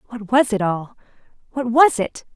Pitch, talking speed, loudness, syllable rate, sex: 230 Hz, 155 wpm, -19 LUFS, 4.7 syllables/s, female